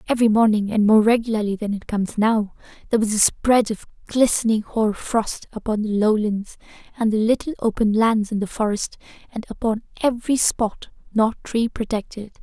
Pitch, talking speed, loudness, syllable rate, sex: 220 Hz, 170 wpm, -21 LUFS, 5.3 syllables/s, female